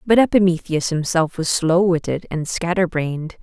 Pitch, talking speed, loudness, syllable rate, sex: 170 Hz, 160 wpm, -19 LUFS, 4.9 syllables/s, female